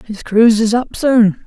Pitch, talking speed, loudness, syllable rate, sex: 225 Hz, 205 wpm, -13 LUFS, 4.4 syllables/s, female